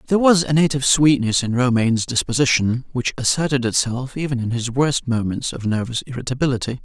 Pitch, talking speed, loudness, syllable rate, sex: 130 Hz, 165 wpm, -19 LUFS, 6.0 syllables/s, male